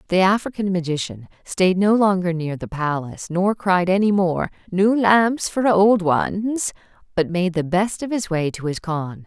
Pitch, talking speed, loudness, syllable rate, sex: 185 Hz, 180 wpm, -20 LUFS, 4.4 syllables/s, female